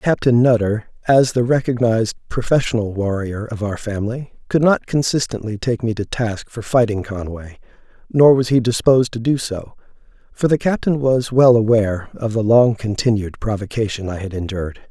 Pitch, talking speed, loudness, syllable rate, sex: 115 Hz, 165 wpm, -18 LUFS, 5.2 syllables/s, male